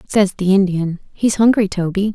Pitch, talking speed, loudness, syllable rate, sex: 195 Hz, 195 wpm, -16 LUFS, 5.4 syllables/s, female